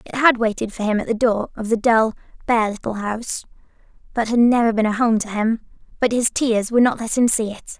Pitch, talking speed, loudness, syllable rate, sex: 225 Hz, 230 wpm, -19 LUFS, 5.4 syllables/s, female